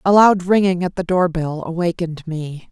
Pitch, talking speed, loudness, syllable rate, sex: 175 Hz, 175 wpm, -18 LUFS, 5.1 syllables/s, female